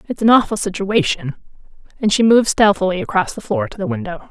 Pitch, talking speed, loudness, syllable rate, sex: 200 Hz, 195 wpm, -17 LUFS, 6.3 syllables/s, female